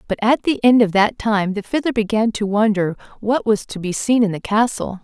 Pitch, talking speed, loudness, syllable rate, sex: 215 Hz, 240 wpm, -18 LUFS, 5.3 syllables/s, female